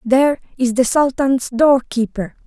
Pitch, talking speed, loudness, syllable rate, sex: 255 Hz, 145 wpm, -16 LUFS, 4.4 syllables/s, female